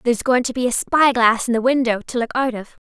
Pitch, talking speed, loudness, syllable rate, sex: 245 Hz, 290 wpm, -18 LUFS, 6.1 syllables/s, female